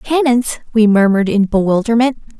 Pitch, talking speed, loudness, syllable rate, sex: 225 Hz, 125 wpm, -14 LUFS, 6.0 syllables/s, female